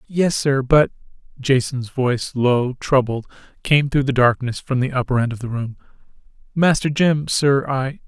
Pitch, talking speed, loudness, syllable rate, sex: 130 Hz, 150 wpm, -19 LUFS, 4.5 syllables/s, male